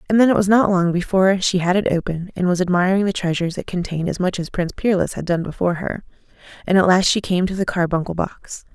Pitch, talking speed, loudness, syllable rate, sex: 185 Hz, 245 wpm, -19 LUFS, 6.5 syllables/s, female